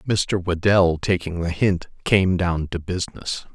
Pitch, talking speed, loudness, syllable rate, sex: 90 Hz, 150 wpm, -21 LUFS, 4.2 syllables/s, male